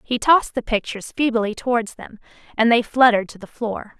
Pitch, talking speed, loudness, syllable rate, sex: 230 Hz, 195 wpm, -19 LUFS, 5.8 syllables/s, female